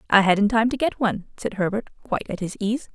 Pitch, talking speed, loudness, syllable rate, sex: 215 Hz, 245 wpm, -23 LUFS, 6.1 syllables/s, female